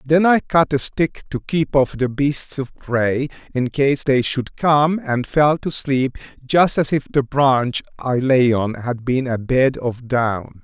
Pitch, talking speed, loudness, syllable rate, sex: 135 Hz, 195 wpm, -19 LUFS, 3.6 syllables/s, male